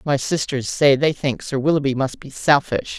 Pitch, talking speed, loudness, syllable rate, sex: 140 Hz, 200 wpm, -19 LUFS, 4.8 syllables/s, female